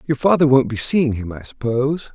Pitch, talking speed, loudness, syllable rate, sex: 135 Hz, 225 wpm, -18 LUFS, 5.5 syllables/s, male